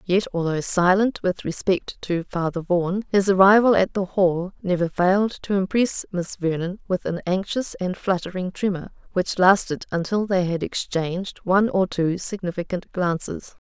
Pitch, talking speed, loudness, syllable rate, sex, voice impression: 185 Hz, 160 wpm, -22 LUFS, 4.7 syllables/s, female, feminine, adult-like, tensed, slightly bright, soft, clear, intellectual, calm, friendly, reassuring, elegant, lively, slightly kind